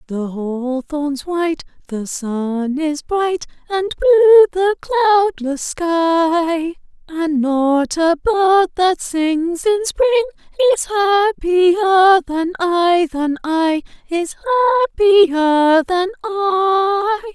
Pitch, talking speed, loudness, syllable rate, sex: 340 Hz, 105 wpm, -16 LUFS, 3.1 syllables/s, female